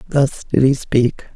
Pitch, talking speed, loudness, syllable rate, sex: 130 Hz, 175 wpm, -17 LUFS, 3.6 syllables/s, female